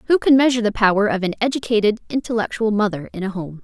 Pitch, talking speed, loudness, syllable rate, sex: 220 Hz, 215 wpm, -19 LUFS, 6.8 syllables/s, female